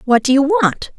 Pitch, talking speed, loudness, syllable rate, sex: 270 Hz, 245 wpm, -14 LUFS, 4.8 syllables/s, female